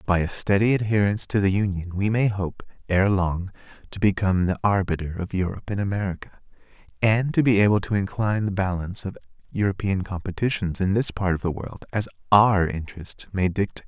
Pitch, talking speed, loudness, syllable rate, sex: 100 Hz, 175 wpm, -23 LUFS, 6.0 syllables/s, male